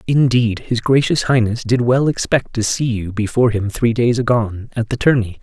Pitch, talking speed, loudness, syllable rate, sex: 115 Hz, 200 wpm, -17 LUFS, 5.2 syllables/s, male